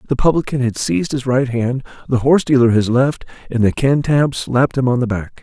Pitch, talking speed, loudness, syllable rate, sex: 125 Hz, 220 wpm, -16 LUFS, 5.7 syllables/s, male